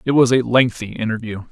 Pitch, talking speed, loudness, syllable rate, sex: 120 Hz, 200 wpm, -18 LUFS, 5.8 syllables/s, male